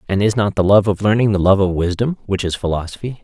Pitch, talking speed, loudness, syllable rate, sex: 100 Hz, 260 wpm, -17 LUFS, 6.4 syllables/s, male